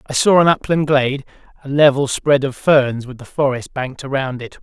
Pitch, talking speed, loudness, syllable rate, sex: 135 Hz, 210 wpm, -16 LUFS, 5.4 syllables/s, male